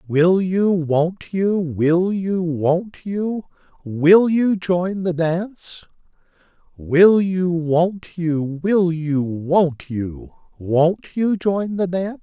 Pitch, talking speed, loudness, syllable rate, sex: 175 Hz, 130 wpm, -19 LUFS, 2.6 syllables/s, male